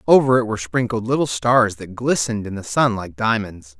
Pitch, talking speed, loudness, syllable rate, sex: 110 Hz, 205 wpm, -19 LUFS, 5.5 syllables/s, male